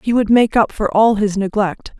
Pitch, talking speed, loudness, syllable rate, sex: 210 Hz, 240 wpm, -15 LUFS, 4.8 syllables/s, female